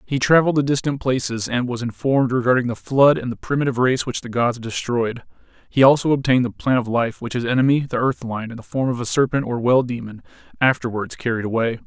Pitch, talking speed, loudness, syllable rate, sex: 125 Hz, 220 wpm, -20 LUFS, 6.2 syllables/s, male